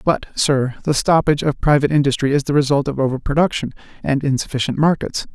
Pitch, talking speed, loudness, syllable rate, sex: 140 Hz, 180 wpm, -18 LUFS, 6.4 syllables/s, male